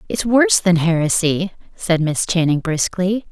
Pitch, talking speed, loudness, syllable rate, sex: 180 Hz, 145 wpm, -17 LUFS, 4.5 syllables/s, female